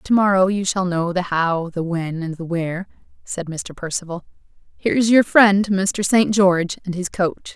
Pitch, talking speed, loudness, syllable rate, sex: 185 Hz, 190 wpm, -19 LUFS, 4.6 syllables/s, female